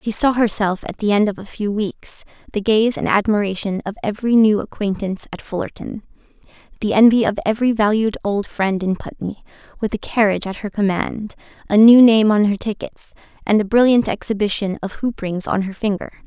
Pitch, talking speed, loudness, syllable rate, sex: 210 Hz, 190 wpm, -18 LUFS, 5.6 syllables/s, female